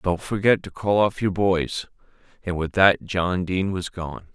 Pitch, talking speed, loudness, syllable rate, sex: 90 Hz, 195 wpm, -22 LUFS, 4.4 syllables/s, male